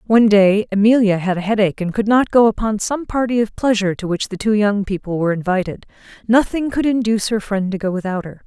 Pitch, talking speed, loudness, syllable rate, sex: 210 Hz, 225 wpm, -17 LUFS, 6.2 syllables/s, female